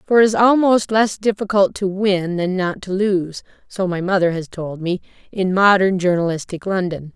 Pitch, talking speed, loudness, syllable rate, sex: 190 Hz, 185 wpm, -18 LUFS, 4.8 syllables/s, female